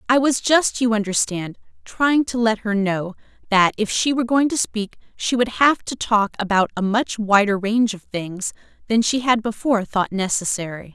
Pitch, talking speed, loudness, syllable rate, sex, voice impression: 220 Hz, 190 wpm, -20 LUFS, 4.8 syllables/s, female, feminine, adult-like, slightly clear, sincere, slightly friendly